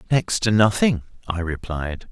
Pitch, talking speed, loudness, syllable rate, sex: 100 Hz, 140 wpm, -21 LUFS, 4.2 syllables/s, male